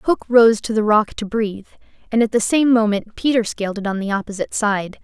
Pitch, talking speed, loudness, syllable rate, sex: 215 Hz, 225 wpm, -18 LUFS, 5.7 syllables/s, female